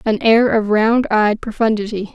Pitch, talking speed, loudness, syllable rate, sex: 220 Hz, 170 wpm, -16 LUFS, 4.5 syllables/s, female